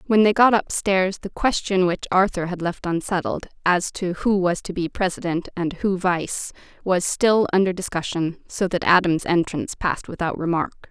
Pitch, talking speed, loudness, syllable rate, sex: 180 Hz, 175 wpm, -22 LUFS, 4.8 syllables/s, female